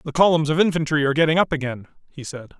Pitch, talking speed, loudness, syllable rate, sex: 150 Hz, 230 wpm, -19 LUFS, 7.7 syllables/s, male